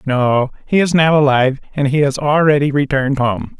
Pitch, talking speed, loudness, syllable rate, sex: 140 Hz, 185 wpm, -15 LUFS, 5.4 syllables/s, male